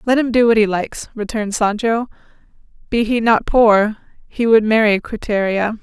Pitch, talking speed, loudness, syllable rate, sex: 220 Hz, 165 wpm, -16 LUFS, 5.2 syllables/s, female